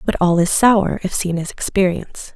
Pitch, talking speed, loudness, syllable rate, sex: 185 Hz, 205 wpm, -17 LUFS, 5.1 syllables/s, female